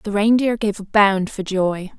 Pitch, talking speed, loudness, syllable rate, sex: 205 Hz, 210 wpm, -18 LUFS, 4.2 syllables/s, female